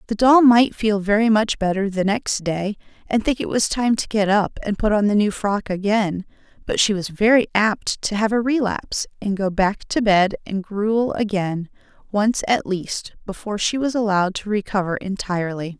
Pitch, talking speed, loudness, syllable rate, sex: 205 Hz, 200 wpm, -20 LUFS, 4.9 syllables/s, female